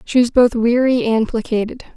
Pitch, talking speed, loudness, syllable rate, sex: 235 Hz, 185 wpm, -16 LUFS, 5.1 syllables/s, female